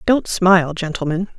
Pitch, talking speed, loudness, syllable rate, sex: 180 Hz, 130 wpm, -17 LUFS, 5.0 syllables/s, female